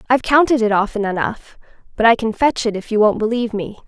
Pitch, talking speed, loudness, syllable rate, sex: 225 Hz, 230 wpm, -17 LUFS, 6.5 syllables/s, female